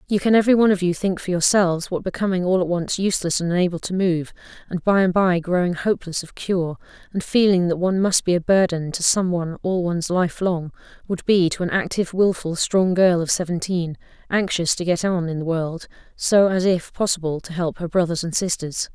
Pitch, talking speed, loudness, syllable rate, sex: 180 Hz, 220 wpm, -21 LUFS, 5.7 syllables/s, female